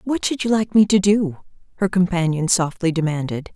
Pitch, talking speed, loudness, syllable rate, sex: 185 Hz, 185 wpm, -19 LUFS, 5.2 syllables/s, female